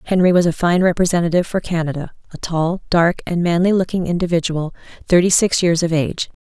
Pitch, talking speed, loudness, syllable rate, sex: 170 Hz, 175 wpm, -17 LUFS, 6.1 syllables/s, female